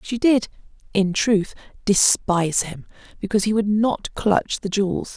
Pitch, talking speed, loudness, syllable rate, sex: 205 Hz, 150 wpm, -20 LUFS, 4.5 syllables/s, female